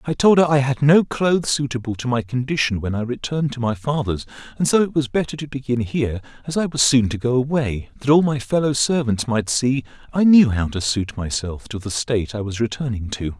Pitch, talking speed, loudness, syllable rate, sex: 125 Hz, 235 wpm, -20 LUFS, 5.7 syllables/s, male